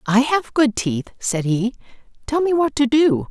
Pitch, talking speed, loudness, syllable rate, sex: 255 Hz, 200 wpm, -19 LUFS, 4.2 syllables/s, female